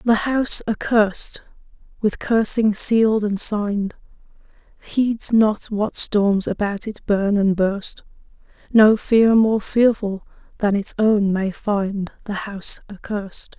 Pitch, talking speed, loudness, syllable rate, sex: 210 Hz, 130 wpm, -19 LUFS, 3.6 syllables/s, female